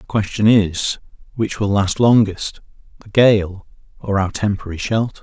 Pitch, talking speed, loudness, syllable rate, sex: 105 Hz, 150 wpm, -17 LUFS, 4.6 syllables/s, male